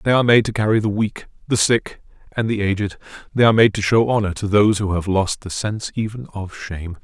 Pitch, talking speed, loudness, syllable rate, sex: 105 Hz, 240 wpm, -19 LUFS, 6.1 syllables/s, male